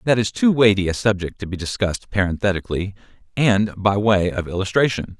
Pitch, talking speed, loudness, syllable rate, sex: 100 Hz, 175 wpm, -20 LUFS, 5.9 syllables/s, male